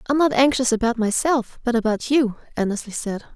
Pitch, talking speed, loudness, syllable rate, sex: 240 Hz, 180 wpm, -21 LUFS, 5.6 syllables/s, female